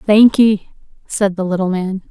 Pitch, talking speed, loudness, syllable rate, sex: 195 Hz, 140 wpm, -15 LUFS, 4.5 syllables/s, female